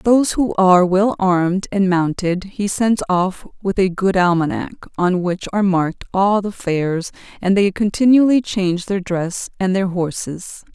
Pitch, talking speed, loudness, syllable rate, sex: 190 Hz, 165 wpm, -17 LUFS, 4.4 syllables/s, female